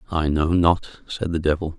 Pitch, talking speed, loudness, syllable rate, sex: 85 Hz, 200 wpm, -21 LUFS, 4.6 syllables/s, male